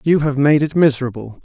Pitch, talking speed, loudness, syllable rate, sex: 140 Hz, 210 wpm, -16 LUFS, 6.1 syllables/s, male